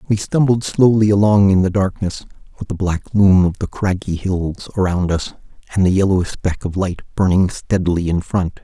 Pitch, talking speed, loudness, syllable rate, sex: 95 Hz, 190 wpm, -17 LUFS, 5.0 syllables/s, male